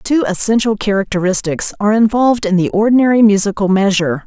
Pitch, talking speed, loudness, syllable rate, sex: 205 Hz, 140 wpm, -13 LUFS, 6.3 syllables/s, female